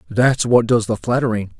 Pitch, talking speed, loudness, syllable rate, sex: 115 Hz, 190 wpm, -17 LUFS, 5.0 syllables/s, male